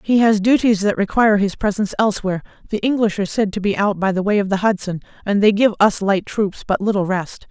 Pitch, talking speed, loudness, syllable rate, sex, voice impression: 205 Hz, 240 wpm, -18 LUFS, 6.3 syllables/s, female, feminine, adult-like, fluent, slightly intellectual, slightly elegant